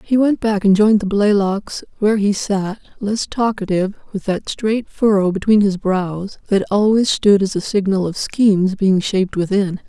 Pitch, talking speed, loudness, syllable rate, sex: 200 Hz, 180 wpm, -17 LUFS, 4.7 syllables/s, female